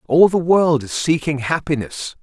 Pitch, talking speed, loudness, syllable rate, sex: 155 Hz, 160 wpm, -17 LUFS, 4.3 syllables/s, male